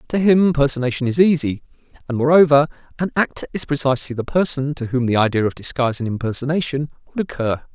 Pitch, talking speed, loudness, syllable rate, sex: 140 Hz, 180 wpm, -19 LUFS, 6.5 syllables/s, male